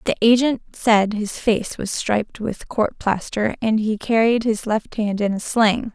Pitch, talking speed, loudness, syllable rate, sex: 220 Hz, 190 wpm, -20 LUFS, 4.1 syllables/s, female